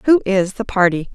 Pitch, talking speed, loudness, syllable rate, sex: 205 Hz, 210 wpm, -17 LUFS, 5.3 syllables/s, female